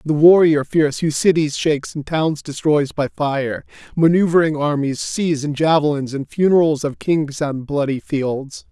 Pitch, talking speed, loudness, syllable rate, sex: 150 Hz, 160 wpm, -18 LUFS, 4.5 syllables/s, male